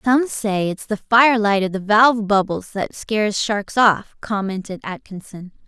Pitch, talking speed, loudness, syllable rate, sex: 210 Hz, 170 wpm, -18 LUFS, 4.3 syllables/s, female